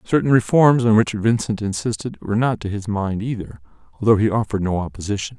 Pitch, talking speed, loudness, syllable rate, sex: 105 Hz, 190 wpm, -19 LUFS, 6.1 syllables/s, male